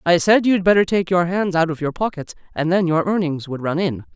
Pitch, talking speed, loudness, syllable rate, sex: 170 Hz, 260 wpm, -19 LUFS, 5.5 syllables/s, female